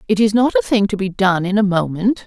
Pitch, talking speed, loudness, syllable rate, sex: 200 Hz, 290 wpm, -16 LUFS, 6.0 syllables/s, female